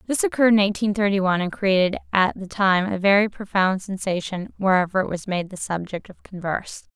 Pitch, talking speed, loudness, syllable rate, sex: 195 Hz, 200 wpm, -21 LUFS, 5.8 syllables/s, female